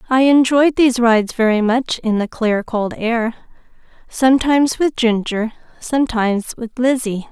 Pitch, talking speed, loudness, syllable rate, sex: 240 Hz, 140 wpm, -16 LUFS, 4.8 syllables/s, female